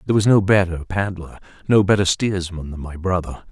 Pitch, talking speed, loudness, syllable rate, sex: 90 Hz, 190 wpm, -19 LUFS, 5.7 syllables/s, male